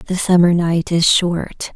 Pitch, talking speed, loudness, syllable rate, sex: 175 Hz, 170 wpm, -15 LUFS, 3.5 syllables/s, female